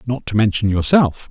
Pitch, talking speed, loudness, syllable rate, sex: 115 Hz, 185 wpm, -16 LUFS, 5.1 syllables/s, male